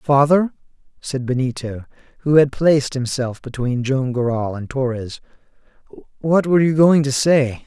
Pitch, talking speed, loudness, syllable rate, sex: 135 Hz, 140 wpm, -18 LUFS, 4.7 syllables/s, male